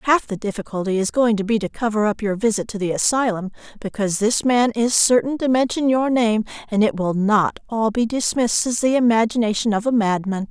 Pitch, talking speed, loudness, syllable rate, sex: 220 Hz, 210 wpm, -19 LUFS, 5.6 syllables/s, female